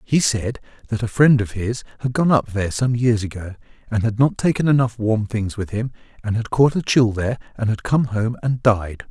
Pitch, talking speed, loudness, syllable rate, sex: 115 Hz, 230 wpm, -20 LUFS, 5.3 syllables/s, male